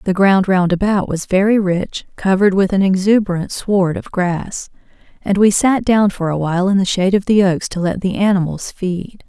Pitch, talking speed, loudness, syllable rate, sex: 190 Hz, 205 wpm, -16 LUFS, 5.1 syllables/s, female